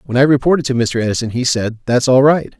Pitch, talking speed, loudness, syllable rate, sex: 130 Hz, 255 wpm, -14 LUFS, 6.3 syllables/s, male